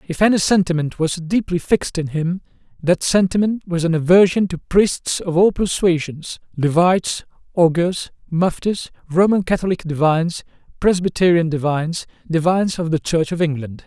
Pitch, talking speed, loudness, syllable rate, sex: 170 Hz, 140 wpm, -18 LUFS, 5.0 syllables/s, male